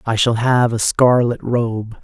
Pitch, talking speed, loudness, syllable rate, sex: 115 Hz, 175 wpm, -16 LUFS, 3.7 syllables/s, male